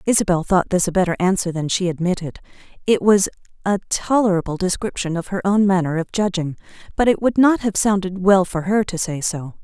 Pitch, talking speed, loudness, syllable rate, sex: 185 Hz, 200 wpm, -19 LUFS, 5.6 syllables/s, female